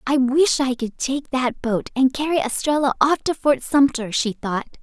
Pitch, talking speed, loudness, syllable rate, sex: 265 Hz, 200 wpm, -20 LUFS, 4.5 syllables/s, female